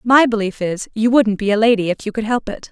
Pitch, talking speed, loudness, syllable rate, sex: 220 Hz, 290 wpm, -17 LUFS, 5.9 syllables/s, female